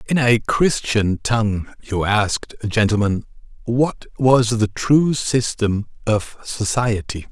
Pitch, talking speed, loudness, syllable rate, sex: 115 Hz, 115 wpm, -19 LUFS, 3.6 syllables/s, male